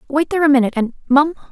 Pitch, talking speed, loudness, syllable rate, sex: 280 Hz, 200 wpm, -16 LUFS, 8.6 syllables/s, female